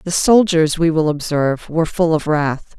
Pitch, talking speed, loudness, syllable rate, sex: 160 Hz, 195 wpm, -16 LUFS, 4.9 syllables/s, female